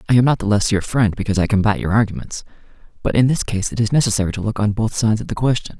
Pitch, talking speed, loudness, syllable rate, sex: 110 Hz, 280 wpm, -18 LUFS, 7.3 syllables/s, male